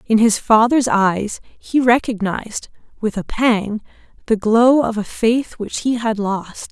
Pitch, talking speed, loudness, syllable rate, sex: 225 Hz, 160 wpm, -17 LUFS, 3.8 syllables/s, female